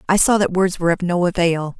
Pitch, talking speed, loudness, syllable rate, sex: 180 Hz, 265 wpm, -18 LUFS, 6.2 syllables/s, female